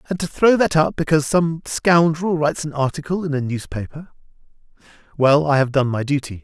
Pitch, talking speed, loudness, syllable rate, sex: 150 Hz, 175 wpm, -19 LUFS, 5.6 syllables/s, male